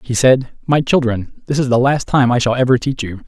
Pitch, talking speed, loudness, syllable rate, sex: 125 Hz, 255 wpm, -15 LUFS, 5.4 syllables/s, male